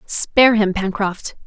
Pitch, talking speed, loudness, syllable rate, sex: 210 Hz, 125 wpm, -16 LUFS, 3.9 syllables/s, female